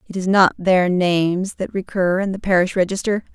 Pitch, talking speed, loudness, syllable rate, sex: 185 Hz, 195 wpm, -18 LUFS, 5.2 syllables/s, female